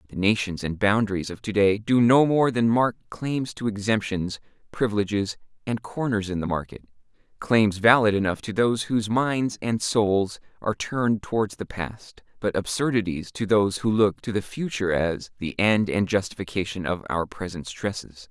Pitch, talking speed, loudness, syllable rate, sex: 105 Hz, 170 wpm, -24 LUFS, 5.0 syllables/s, male